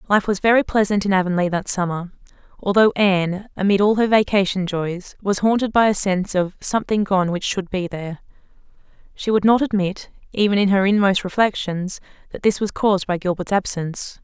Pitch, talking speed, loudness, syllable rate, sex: 195 Hz, 180 wpm, -19 LUFS, 5.6 syllables/s, female